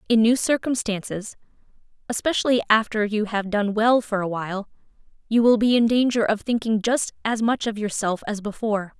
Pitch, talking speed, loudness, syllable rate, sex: 220 Hz, 175 wpm, -22 LUFS, 5.4 syllables/s, female